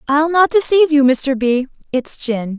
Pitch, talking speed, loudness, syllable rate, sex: 280 Hz, 185 wpm, -15 LUFS, 4.6 syllables/s, female